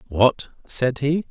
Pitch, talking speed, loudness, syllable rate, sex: 135 Hz, 140 wpm, -21 LUFS, 3.1 syllables/s, male